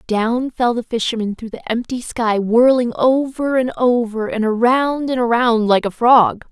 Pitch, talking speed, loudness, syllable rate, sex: 235 Hz, 175 wpm, -17 LUFS, 4.3 syllables/s, female